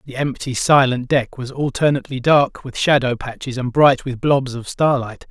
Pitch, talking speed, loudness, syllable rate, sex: 130 Hz, 180 wpm, -18 LUFS, 4.9 syllables/s, male